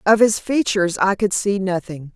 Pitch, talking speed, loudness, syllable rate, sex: 195 Hz, 195 wpm, -19 LUFS, 4.9 syllables/s, female